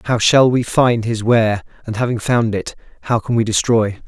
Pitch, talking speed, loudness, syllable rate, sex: 115 Hz, 205 wpm, -16 LUFS, 5.1 syllables/s, male